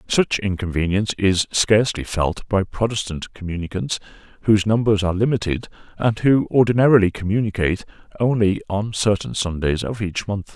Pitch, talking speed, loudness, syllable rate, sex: 100 Hz, 130 wpm, -20 LUFS, 5.5 syllables/s, male